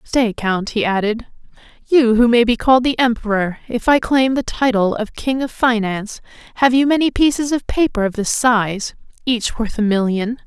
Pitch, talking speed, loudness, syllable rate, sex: 235 Hz, 190 wpm, -17 LUFS, 4.9 syllables/s, female